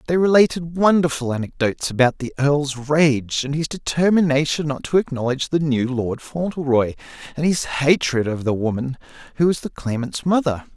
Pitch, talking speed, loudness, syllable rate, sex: 145 Hz, 160 wpm, -20 LUFS, 5.2 syllables/s, male